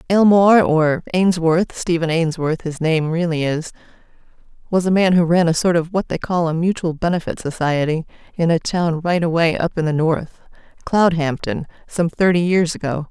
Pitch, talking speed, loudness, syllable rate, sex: 170 Hz, 165 wpm, -18 LUFS, 4.4 syllables/s, female